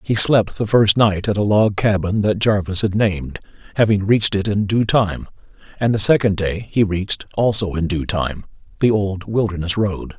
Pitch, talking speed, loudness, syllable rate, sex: 100 Hz, 195 wpm, -18 LUFS, 4.9 syllables/s, male